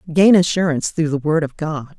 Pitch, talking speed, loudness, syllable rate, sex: 160 Hz, 210 wpm, -17 LUFS, 5.8 syllables/s, female